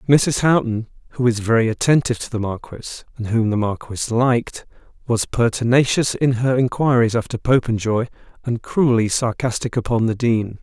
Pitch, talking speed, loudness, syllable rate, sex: 120 Hz, 150 wpm, -19 LUFS, 5.4 syllables/s, male